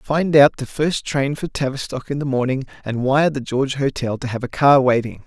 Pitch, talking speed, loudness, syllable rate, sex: 135 Hz, 230 wpm, -19 LUFS, 5.2 syllables/s, male